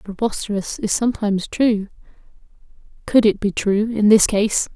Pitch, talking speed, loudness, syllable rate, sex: 210 Hz, 150 wpm, -18 LUFS, 5.1 syllables/s, female